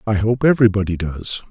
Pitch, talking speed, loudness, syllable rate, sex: 105 Hz, 160 wpm, -18 LUFS, 6.3 syllables/s, male